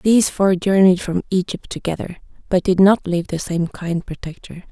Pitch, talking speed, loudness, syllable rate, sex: 185 Hz, 165 wpm, -18 LUFS, 5.3 syllables/s, female